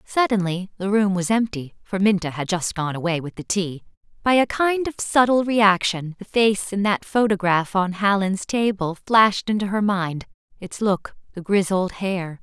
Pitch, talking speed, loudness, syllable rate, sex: 195 Hz, 160 wpm, -21 LUFS, 4.6 syllables/s, female